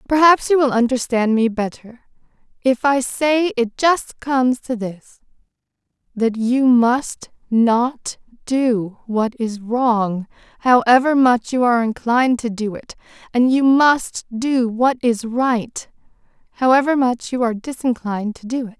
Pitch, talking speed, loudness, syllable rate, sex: 245 Hz, 145 wpm, -18 LUFS, 4.1 syllables/s, female